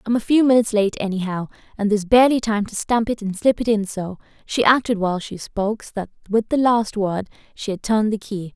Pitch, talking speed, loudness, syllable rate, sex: 215 Hz, 240 wpm, -20 LUFS, 6.1 syllables/s, female